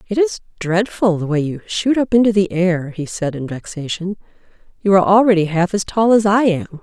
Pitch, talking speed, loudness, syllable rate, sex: 190 Hz, 210 wpm, -17 LUFS, 5.4 syllables/s, female